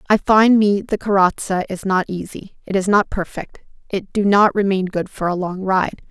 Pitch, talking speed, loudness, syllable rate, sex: 195 Hz, 205 wpm, -18 LUFS, 4.8 syllables/s, female